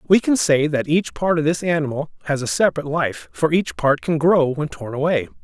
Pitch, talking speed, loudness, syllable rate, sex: 155 Hz, 230 wpm, -20 LUFS, 5.4 syllables/s, male